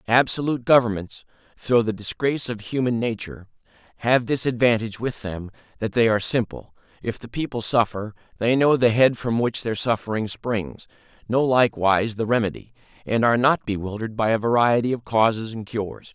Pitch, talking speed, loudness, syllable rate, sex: 115 Hz, 165 wpm, -22 LUFS, 5.1 syllables/s, male